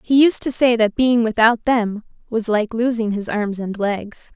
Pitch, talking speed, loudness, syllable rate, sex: 225 Hz, 205 wpm, -18 LUFS, 4.3 syllables/s, female